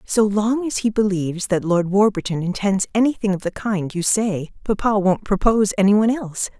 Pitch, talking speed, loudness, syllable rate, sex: 200 Hz, 190 wpm, -19 LUFS, 5.5 syllables/s, female